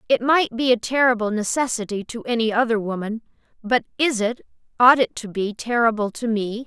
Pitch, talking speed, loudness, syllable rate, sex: 230 Hz, 180 wpm, -21 LUFS, 5.4 syllables/s, female